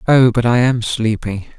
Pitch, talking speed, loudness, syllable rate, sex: 120 Hz, 190 wpm, -15 LUFS, 4.4 syllables/s, male